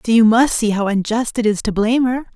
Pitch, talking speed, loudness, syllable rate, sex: 225 Hz, 280 wpm, -16 LUFS, 6.1 syllables/s, female